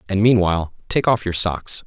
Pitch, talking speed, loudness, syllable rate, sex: 100 Hz, 195 wpm, -18 LUFS, 5.2 syllables/s, male